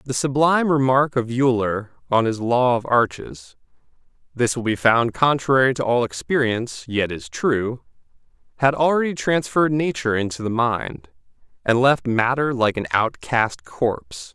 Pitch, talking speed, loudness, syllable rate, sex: 120 Hz, 145 wpm, -20 LUFS, 4.7 syllables/s, male